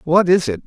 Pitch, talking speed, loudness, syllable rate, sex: 165 Hz, 270 wpm, -16 LUFS, 5.5 syllables/s, male